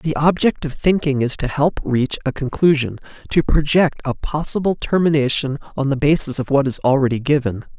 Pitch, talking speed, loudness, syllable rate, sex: 145 Hz, 175 wpm, -18 LUFS, 5.3 syllables/s, male